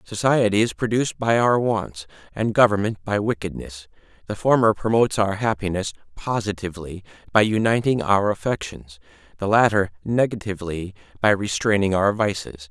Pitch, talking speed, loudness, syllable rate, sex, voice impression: 105 Hz, 125 wpm, -21 LUFS, 5.3 syllables/s, male, very masculine, very adult-like, very thick, slightly tensed, weak, slightly dark, slightly soft, slightly muffled, fluent, cool, slightly intellectual, refreshing, slightly sincere, slightly calm, slightly mature, friendly, reassuring, unique, slightly elegant, wild, slightly sweet, lively, kind, slightly sharp